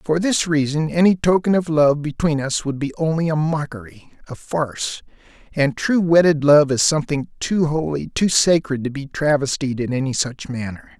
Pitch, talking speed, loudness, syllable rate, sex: 150 Hz, 180 wpm, -19 LUFS, 5.0 syllables/s, male